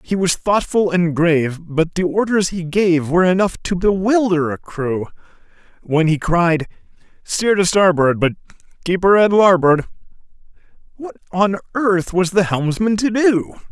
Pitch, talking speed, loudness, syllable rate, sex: 180 Hz, 150 wpm, -17 LUFS, 4.3 syllables/s, male